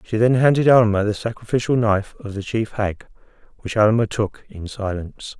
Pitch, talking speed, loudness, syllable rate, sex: 110 Hz, 180 wpm, -19 LUFS, 5.4 syllables/s, male